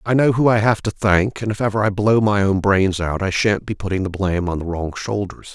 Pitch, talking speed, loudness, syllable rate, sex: 100 Hz, 280 wpm, -19 LUFS, 5.6 syllables/s, male